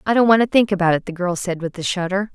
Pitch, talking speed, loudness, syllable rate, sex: 190 Hz, 335 wpm, -19 LUFS, 6.7 syllables/s, female